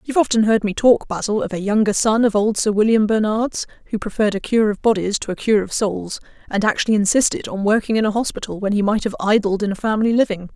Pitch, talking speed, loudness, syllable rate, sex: 215 Hz, 245 wpm, -18 LUFS, 6.4 syllables/s, female